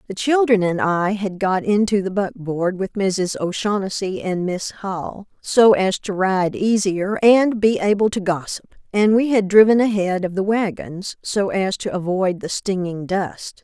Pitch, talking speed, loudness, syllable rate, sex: 195 Hz, 175 wpm, -19 LUFS, 4.2 syllables/s, female